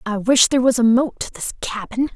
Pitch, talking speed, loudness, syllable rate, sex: 240 Hz, 250 wpm, -18 LUFS, 5.7 syllables/s, female